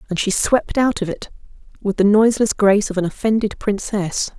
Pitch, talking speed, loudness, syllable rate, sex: 205 Hz, 190 wpm, -18 LUFS, 5.5 syllables/s, female